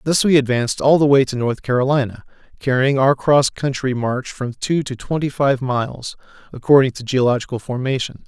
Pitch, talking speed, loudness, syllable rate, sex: 130 Hz, 165 wpm, -18 LUFS, 5.4 syllables/s, male